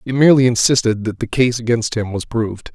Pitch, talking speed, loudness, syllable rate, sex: 115 Hz, 220 wpm, -16 LUFS, 6.1 syllables/s, male